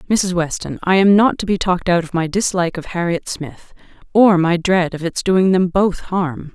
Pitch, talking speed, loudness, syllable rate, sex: 180 Hz, 220 wpm, -17 LUFS, 4.8 syllables/s, female